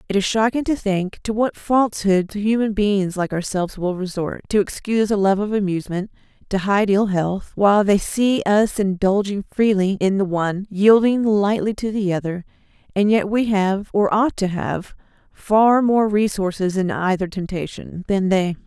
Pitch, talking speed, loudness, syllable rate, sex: 200 Hz, 175 wpm, -19 LUFS, 4.7 syllables/s, female